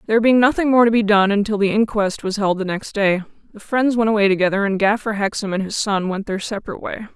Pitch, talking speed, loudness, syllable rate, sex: 210 Hz, 245 wpm, -18 LUFS, 6.3 syllables/s, female